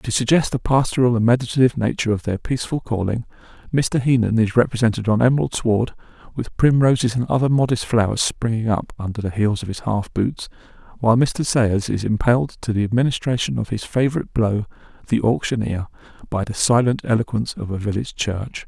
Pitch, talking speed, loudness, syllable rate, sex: 115 Hz, 175 wpm, -20 LUFS, 6.0 syllables/s, male